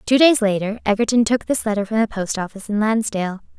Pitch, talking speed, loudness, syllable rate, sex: 215 Hz, 215 wpm, -19 LUFS, 6.4 syllables/s, female